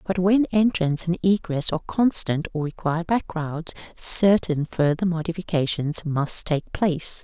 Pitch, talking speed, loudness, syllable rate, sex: 170 Hz, 140 wpm, -22 LUFS, 4.6 syllables/s, female